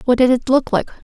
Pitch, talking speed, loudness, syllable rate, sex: 255 Hz, 270 wpm, -16 LUFS, 6.2 syllables/s, female